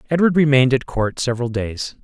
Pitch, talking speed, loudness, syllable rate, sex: 130 Hz, 175 wpm, -18 LUFS, 6.1 syllables/s, male